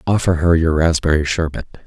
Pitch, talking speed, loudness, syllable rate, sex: 80 Hz, 160 wpm, -16 LUFS, 5.8 syllables/s, male